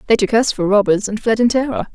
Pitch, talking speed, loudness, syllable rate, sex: 220 Hz, 275 wpm, -16 LUFS, 6.4 syllables/s, female